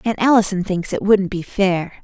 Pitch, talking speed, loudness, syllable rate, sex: 190 Hz, 205 wpm, -18 LUFS, 4.9 syllables/s, female